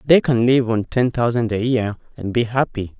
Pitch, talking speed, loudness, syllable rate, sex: 120 Hz, 220 wpm, -19 LUFS, 4.8 syllables/s, male